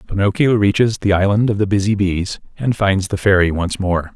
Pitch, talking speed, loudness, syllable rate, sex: 100 Hz, 200 wpm, -17 LUFS, 5.2 syllables/s, male